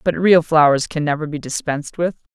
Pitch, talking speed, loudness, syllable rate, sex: 155 Hz, 205 wpm, -18 LUFS, 5.7 syllables/s, female